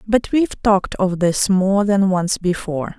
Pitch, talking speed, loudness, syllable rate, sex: 195 Hz, 180 wpm, -18 LUFS, 4.6 syllables/s, female